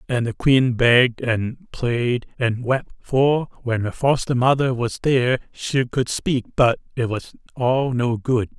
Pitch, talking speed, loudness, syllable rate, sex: 125 Hz, 160 wpm, -20 LUFS, 3.8 syllables/s, male